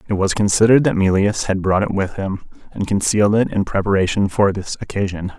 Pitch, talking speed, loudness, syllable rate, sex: 100 Hz, 200 wpm, -18 LUFS, 6.0 syllables/s, male